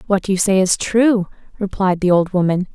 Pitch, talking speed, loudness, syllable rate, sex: 195 Hz, 195 wpm, -17 LUFS, 4.9 syllables/s, female